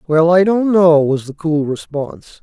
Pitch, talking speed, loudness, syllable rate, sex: 160 Hz, 200 wpm, -14 LUFS, 4.4 syllables/s, male